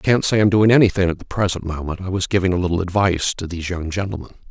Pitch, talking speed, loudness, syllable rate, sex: 95 Hz, 265 wpm, -19 LUFS, 7.3 syllables/s, male